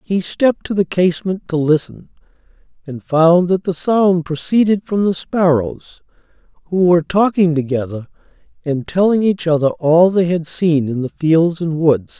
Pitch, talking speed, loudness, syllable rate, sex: 170 Hz, 160 wpm, -16 LUFS, 4.6 syllables/s, male